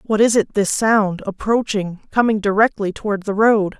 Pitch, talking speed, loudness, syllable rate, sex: 205 Hz, 175 wpm, -18 LUFS, 4.6 syllables/s, female